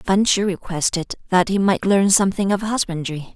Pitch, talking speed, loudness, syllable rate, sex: 190 Hz, 180 wpm, -19 LUFS, 5.1 syllables/s, female